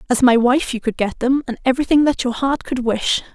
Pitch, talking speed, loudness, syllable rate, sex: 250 Hz, 250 wpm, -18 LUFS, 5.8 syllables/s, female